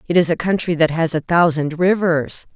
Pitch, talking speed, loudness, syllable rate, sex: 165 Hz, 210 wpm, -17 LUFS, 5.0 syllables/s, female